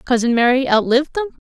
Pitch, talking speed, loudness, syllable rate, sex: 260 Hz, 160 wpm, -16 LUFS, 6.9 syllables/s, female